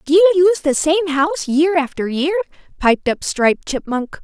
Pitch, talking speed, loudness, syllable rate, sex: 300 Hz, 185 wpm, -17 LUFS, 5.1 syllables/s, female